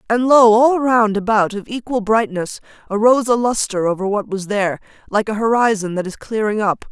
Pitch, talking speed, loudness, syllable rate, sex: 215 Hz, 190 wpm, -17 LUFS, 5.4 syllables/s, female